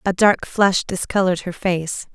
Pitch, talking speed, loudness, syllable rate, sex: 185 Hz, 170 wpm, -19 LUFS, 4.7 syllables/s, female